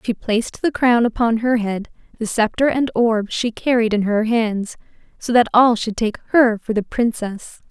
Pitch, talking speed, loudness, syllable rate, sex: 225 Hz, 195 wpm, -18 LUFS, 4.6 syllables/s, female